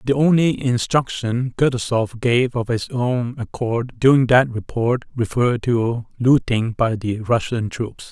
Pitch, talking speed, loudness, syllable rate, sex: 120 Hz, 140 wpm, -19 LUFS, 4.1 syllables/s, male